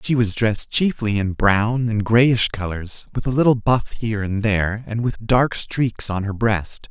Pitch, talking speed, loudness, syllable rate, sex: 110 Hz, 200 wpm, -20 LUFS, 4.3 syllables/s, male